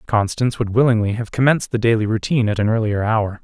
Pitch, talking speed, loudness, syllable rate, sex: 110 Hz, 210 wpm, -18 LUFS, 6.7 syllables/s, male